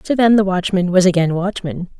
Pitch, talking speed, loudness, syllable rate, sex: 185 Hz, 210 wpm, -16 LUFS, 5.5 syllables/s, female